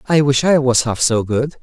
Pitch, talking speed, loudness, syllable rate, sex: 135 Hz, 260 wpm, -15 LUFS, 4.7 syllables/s, male